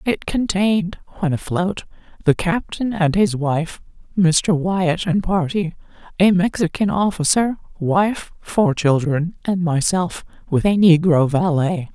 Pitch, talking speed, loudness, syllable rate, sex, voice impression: 175 Hz, 125 wpm, -19 LUFS, 3.9 syllables/s, female, feminine, slightly adult-like, slightly soft, slightly cute, calm, sweet